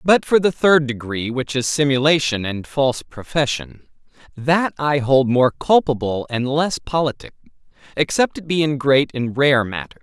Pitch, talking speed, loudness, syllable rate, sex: 140 Hz, 160 wpm, -18 LUFS, 4.6 syllables/s, male